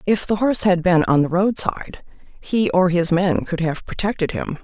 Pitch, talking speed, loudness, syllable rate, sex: 180 Hz, 205 wpm, -19 LUFS, 4.9 syllables/s, female